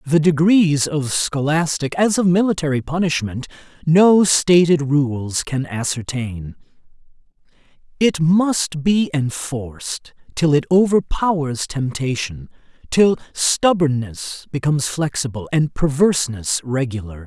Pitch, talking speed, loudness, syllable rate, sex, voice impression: 150 Hz, 95 wpm, -18 LUFS, 4.0 syllables/s, male, masculine, adult-like, relaxed, bright, muffled, fluent, slightly refreshing, sincere, calm, friendly, slightly reassuring, slightly wild, kind